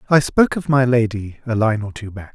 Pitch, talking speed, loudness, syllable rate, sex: 120 Hz, 255 wpm, -18 LUFS, 5.7 syllables/s, male